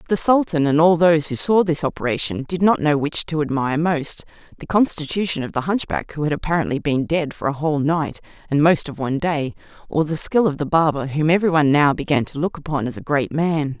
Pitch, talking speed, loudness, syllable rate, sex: 155 Hz, 225 wpm, -19 LUFS, 5.9 syllables/s, female